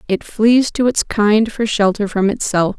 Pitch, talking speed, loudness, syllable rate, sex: 215 Hz, 195 wpm, -16 LUFS, 4.2 syllables/s, female